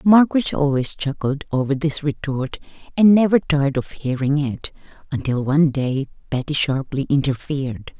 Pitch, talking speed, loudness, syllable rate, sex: 145 Hz, 135 wpm, -20 LUFS, 5.0 syllables/s, female